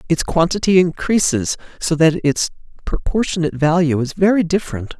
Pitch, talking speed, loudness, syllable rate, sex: 165 Hz, 130 wpm, -17 LUFS, 5.4 syllables/s, male